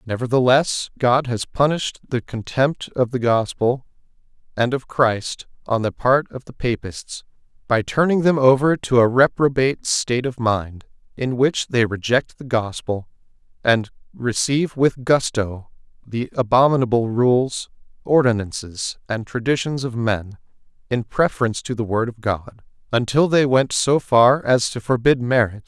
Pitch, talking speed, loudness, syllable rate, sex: 125 Hz, 145 wpm, -20 LUFS, 4.5 syllables/s, male